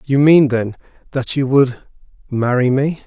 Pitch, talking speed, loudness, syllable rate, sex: 130 Hz, 135 wpm, -16 LUFS, 4.2 syllables/s, male